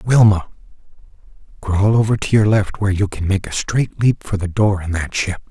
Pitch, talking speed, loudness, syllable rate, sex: 100 Hz, 205 wpm, -17 LUFS, 5.1 syllables/s, male